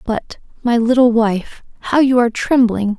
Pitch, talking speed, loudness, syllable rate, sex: 235 Hz, 160 wpm, -15 LUFS, 4.6 syllables/s, female